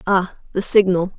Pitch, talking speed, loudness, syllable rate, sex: 185 Hz, 150 wpm, -18 LUFS, 4.6 syllables/s, female